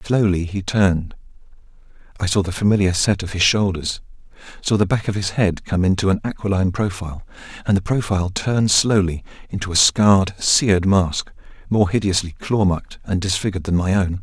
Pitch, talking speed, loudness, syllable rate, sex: 95 Hz, 175 wpm, -19 LUFS, 5.6 syllables/s, male